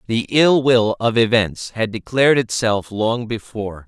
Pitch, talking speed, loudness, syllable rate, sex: 115 Hz, 155 wpm, -18 LUFS, 4.4 syllables/s, male